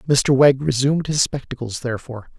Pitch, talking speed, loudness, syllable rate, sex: 135 Hz, 150 wpm, -19 LUFS, 6.0 syllables/s, male